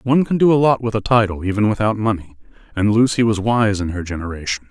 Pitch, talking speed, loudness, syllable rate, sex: 110 Hz, 230 wpm, -18 LUFS, 6.4 syllables/s, male